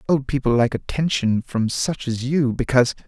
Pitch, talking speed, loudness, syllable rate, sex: 130 Hz, 175 wpm, -21 LUFS, 5.0 syllables/s, male